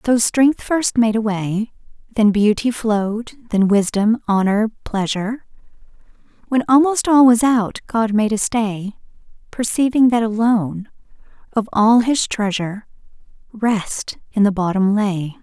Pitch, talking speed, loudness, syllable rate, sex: 220 Hz, 130 wpm, -17 LUFS, 4.1 syllables/s, female